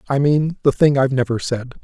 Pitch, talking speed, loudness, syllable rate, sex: 135 Hz, 230 wpm, -18 LUFS, 6.0 syllables/s, male